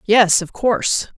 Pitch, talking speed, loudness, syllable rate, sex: 205 Hz, 150 wpm, -16 LUFS, 4.0 syllables/s, female